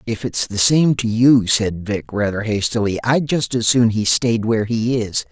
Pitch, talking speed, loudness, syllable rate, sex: 115 Hz, 215 wpm, -17 LUFS, 4.5 syllables/s, male